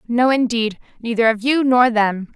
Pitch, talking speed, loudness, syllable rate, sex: 235 Hz, 180 wpm, -17 LUFS, 4.6 syllables/s, female